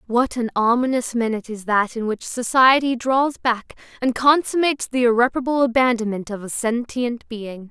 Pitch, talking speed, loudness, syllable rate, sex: 240 Hz, 155 wpm, -20 LUFS, 5.1 syllables/s, female